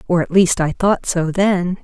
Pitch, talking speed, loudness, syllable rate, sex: 180 Hz, 230 wpm, -16 LUFS, 4.2 syllables/s, female